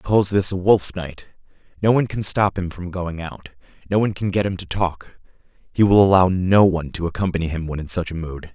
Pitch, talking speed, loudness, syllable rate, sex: 90 Hz, 240 wpm, -20 LUFS, 5.9 syllables/s, male